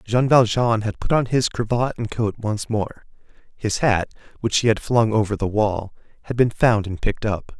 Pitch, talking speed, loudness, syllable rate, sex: 110 Hz, 205 wpm, -21 LUFS, 4.8 syllables/s, male